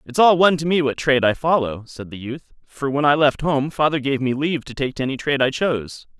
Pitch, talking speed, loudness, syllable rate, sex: 140 Hz, 270 wpm, -19 LUFS, 6.2 syllables/s, male